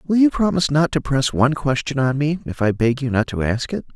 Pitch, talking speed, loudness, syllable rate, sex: 140 Hz, 275 wpm, -19 LUFS, 5.8 syllables/s, male